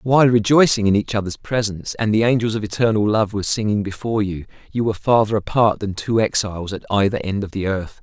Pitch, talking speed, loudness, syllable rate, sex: 105 Hz, 215 wpm, -19 LUFS, 6.3 syllables/s, male